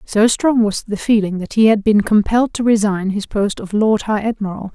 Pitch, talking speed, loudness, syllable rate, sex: 210 Hz, 230 wpm, -16 LUFS, 5.2 syllables/s, female